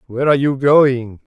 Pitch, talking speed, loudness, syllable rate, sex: 135 Hz, 180 wpm, -15 LUFS, 5.6 syllables/s, male